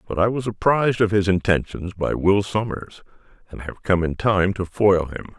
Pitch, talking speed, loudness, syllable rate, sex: 100 Hz, 200 wpm, -21 LUFS, 5.1 syllables/s, male